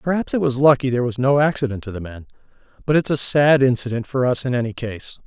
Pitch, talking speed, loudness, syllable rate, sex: 130 Hz, 240 wpm, -19 LUFS, 6.4 syllables/s, male